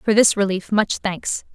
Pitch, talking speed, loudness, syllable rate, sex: 200 Hz, 195 wpm, -20 LUFS, 4.4 syllables/s, female